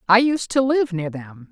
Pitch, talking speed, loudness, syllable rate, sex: 215 Hz, 235 wpm, -20 LUFS, 4.4 syllables/s, female